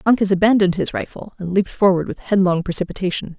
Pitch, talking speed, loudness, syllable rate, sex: 185 Hz, 175 wpm, -18 LUFS, 6.8 syllables/s, female